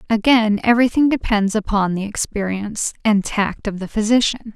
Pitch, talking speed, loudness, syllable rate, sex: 215 Hz, 145 wpm, -18 LUFS, 5.2 syllables/s, female